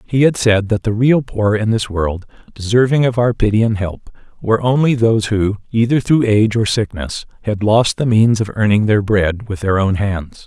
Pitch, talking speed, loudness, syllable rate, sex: 110 Hz, 210 wpm, -15 LUFS, 5.0 syllables/s, male